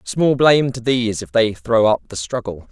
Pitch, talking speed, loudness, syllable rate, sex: 115 Hz, 220 wpm, -17 LUFS, 5.0 syllables/s, male